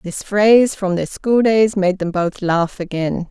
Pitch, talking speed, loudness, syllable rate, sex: 195 Hz, 200 wpm, -17 LUFS, 4.1 syllables/s, female